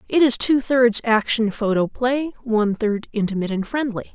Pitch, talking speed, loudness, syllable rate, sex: 230 Hz, 160 wpm, -20 LUFS, 5.0 syllables/s, female